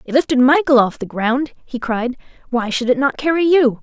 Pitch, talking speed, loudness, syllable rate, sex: 260 Hz, 220 wpm, -17 LUFS, 5.1 syllables/s, female